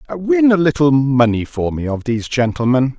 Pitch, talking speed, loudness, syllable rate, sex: 140 Hz, 180 wpm, -16 LUFS, 5.0 syllables/s, male